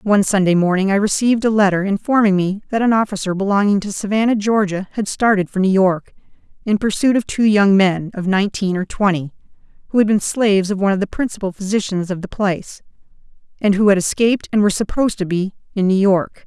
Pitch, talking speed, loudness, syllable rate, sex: 200 Hz, 205 wpm, -17 LUFS, 6.2 syllables/s, female